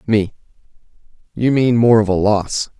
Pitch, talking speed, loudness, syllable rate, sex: 110 Hz, 150 wpm, -15 LUFS, 4.5 syllables/s, male